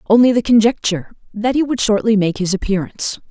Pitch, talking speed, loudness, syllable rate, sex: 215 Hz, 180 wpm, -16 LUFS, 6.1 syllables/s, female